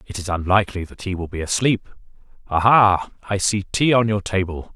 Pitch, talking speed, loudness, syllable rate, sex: 100 Hz, 200 wpm, -20 LUFS, 5.5 syllables/s, male